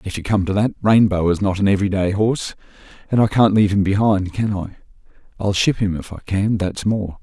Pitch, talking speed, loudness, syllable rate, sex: 100 Hz, 235 wpm, -18 LUFS, 6.0 syllables/s, male